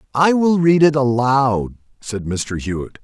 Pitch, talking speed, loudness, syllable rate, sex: 130 Hz, 160 wpm, -17 LUFS, 4.0 syllables/s, male